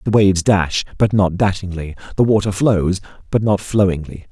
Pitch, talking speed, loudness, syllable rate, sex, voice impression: 95 Hz, 165 wpm, -17 LUFS, 5.1 syllables/s, male, masculine, adult-like, fluent, slightly cool, sincere, calm